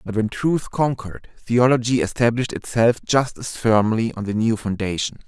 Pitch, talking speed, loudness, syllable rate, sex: 115 Hz, 160 wpm, -20 LUFS, 5.1 syllables/s, male